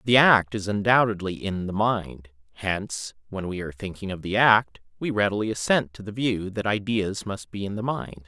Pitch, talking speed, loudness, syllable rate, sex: 105 Hz, 205 wpm, -24 LUFS, 5.1 syllables/s, male